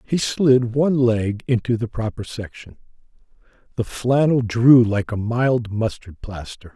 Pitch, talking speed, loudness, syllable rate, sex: 115 Hz, 140 wpm, -19 LUFS, 4.1 syllables/s, male